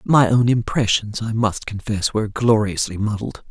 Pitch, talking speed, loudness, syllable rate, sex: 110 Hz, 155 wpm, -19 LUFS, 4.7 syllables/s, female